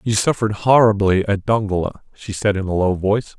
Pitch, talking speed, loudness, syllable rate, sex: 105 Hz, 195 wpm, -18 LUFS, 5.6 syllables/s, male